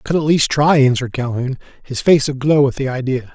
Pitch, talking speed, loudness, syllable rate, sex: 135 Hz, 235 wpm, -16 LUFS, 6.0 syllables/s, male